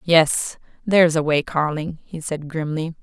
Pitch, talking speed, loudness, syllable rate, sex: 160 Hz, 160 wpm, -21 LUFS, 4.3 syllables/s, female